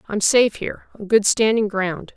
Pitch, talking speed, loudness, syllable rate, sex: 210 Hz, 195 wpm, -18 LUFS, 5.4 syllables/s, female